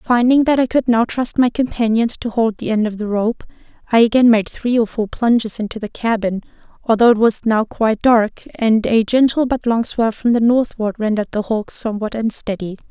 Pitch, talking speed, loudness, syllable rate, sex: 225 Hz, 210 wpm, -17 LUFS, 5.2 syllables/s, female